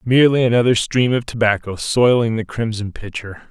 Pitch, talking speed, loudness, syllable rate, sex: 115 Hz, 155 wpm, -17 LUFS, 5.4 syllables/s, male